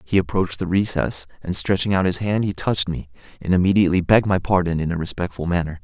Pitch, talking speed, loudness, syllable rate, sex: 90 Hz, 215 wpm, -20 LUFS, 6.6 syllables/s, male